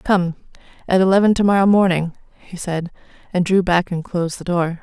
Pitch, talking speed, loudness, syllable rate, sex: 180 Hz, 160 wpm, -18 LUFS, 5.5 syllables/s, female